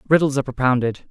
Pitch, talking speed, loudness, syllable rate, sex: 135 Hz, 160 wpm, -19 LUFS, 7.8 syllables/s, male